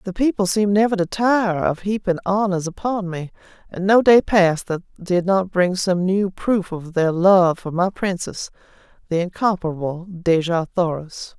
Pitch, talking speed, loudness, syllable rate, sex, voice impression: 185 Hz, 170 wpm, -19 LUFS, 4.6 syllables/s, female, feminine, adult-like, thick, slightly relaxed, powerful, muffled, slightly raspy, intellectual, friendly, lively, slightly intense, slightly sharp